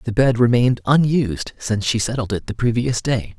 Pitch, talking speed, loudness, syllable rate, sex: 115 Hz, 195 wpm, -19 LUFS, 5.7 syllables/s, male